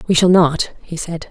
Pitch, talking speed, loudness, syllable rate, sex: 170 Hz, 230 wpm, -15 LUFS, 4.5 syllables/s, female